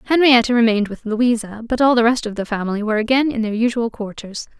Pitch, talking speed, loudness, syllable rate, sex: 230 Hz, 220 wpm, -18 LUFS, 6.6 syllables/s, female